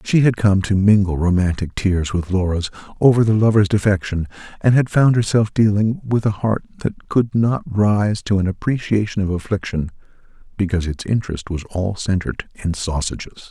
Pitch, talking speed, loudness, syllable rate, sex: 100 Hz, 170 wpm, -19 LUFS, 5.2 syllables/s, male